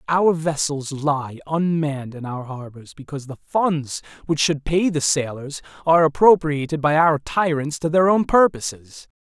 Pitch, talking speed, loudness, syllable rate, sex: 150 Hz, 155 wpm, -20 LUFS, 4.6 syllables/s, male